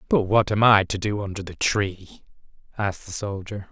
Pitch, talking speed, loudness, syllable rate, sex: 100 Hz, 195 wpm, -23 LUFS, 5.0 syllables/s, male